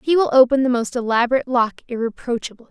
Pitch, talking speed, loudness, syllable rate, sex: 245 Hz, 175 wpm, -19 LUFS, 7.0 syllables/s, female